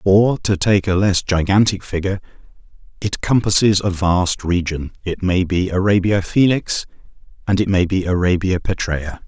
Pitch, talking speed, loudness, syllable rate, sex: 95 Hz, 150 wpm, -18 LUFS, 4.8 syllables/s, male